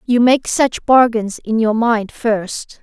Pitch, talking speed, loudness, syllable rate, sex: 230 Hz, 170 wpm, -15 LUFS, 3.4 syllables/s, female